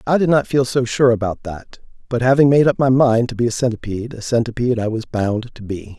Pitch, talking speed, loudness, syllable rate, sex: 120 Hz, 250 wpm, -17 LUFS, 5.9 syllables/s, male